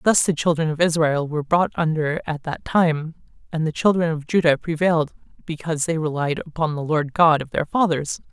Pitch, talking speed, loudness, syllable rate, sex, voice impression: 160 Hz, 195 wpm, -21 LUFS, 5.4 syllables/s, female, feminine, adult-like, tensed, slightly powerful, slightly hard, clear, intellectual, slightly sincere, unique, slightly sharp